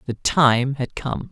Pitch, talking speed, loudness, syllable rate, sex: 125 Hz, 185 wpm, -20 LUFS, 3.5 syllables/s, male